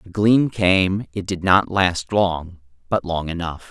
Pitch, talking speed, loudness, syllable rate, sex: 95 Hz, 180 wpm, -20 LUFS, 3.6 syllables/s, male